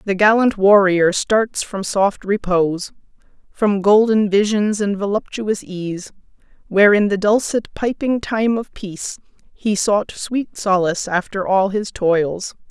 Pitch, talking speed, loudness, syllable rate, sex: 200 Hz, 130 wpm, -18 LUFS, 4.0 syllables/s, female